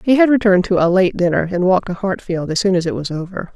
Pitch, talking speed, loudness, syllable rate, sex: 185 Hz, 285 wpm, -16 LUFS, 6.7 syllables/s, female